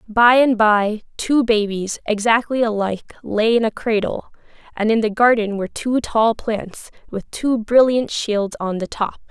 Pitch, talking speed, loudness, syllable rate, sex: 220 Hz, 170 wpm, -18 LUFS, 4.4 syllables/s, female